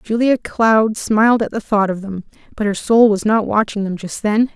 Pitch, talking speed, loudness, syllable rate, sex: 215 Hz, 225 wpm, -16 LUFS, 4.9 syllables/s, female